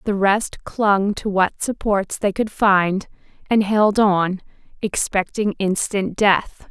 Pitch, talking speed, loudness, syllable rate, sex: 200 Hz, 135 wpm, -19 LUFS, 3.3 syllables/s, female